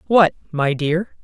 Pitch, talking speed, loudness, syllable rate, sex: 170 Hz, 145 wpm, -19 LUFS, 3.5 syllables/s, female